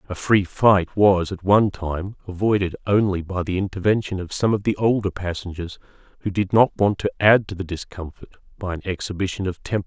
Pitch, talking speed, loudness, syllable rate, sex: 95 Hz, 195 wpm, -21 LUFS, 5.6 syllables/s, male